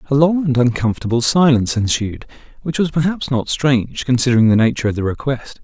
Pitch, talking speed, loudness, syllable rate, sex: 130 Hz, 180 wpm, -16 LUFS, 6.3 syllables/s, male